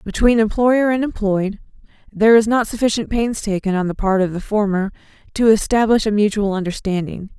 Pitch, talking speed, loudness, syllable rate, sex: 210 Hz, 170 wpm, -17 LUFS, 5.6 syllables/s, female